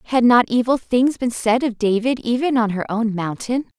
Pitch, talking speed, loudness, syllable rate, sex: 235 Hz, 205 wpm, -19 LUFS, 4.9 syllables/s, female